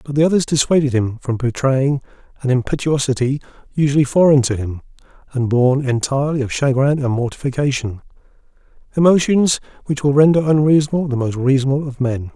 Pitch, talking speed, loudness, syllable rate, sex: 135 Hz, 145 wpm, -17 LUFS, 6.0 syllables/s, male